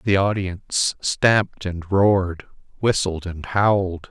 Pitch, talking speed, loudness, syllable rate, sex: 95 Hz, 115 wpm, -21 LUFS, 3.8 syllables/s, male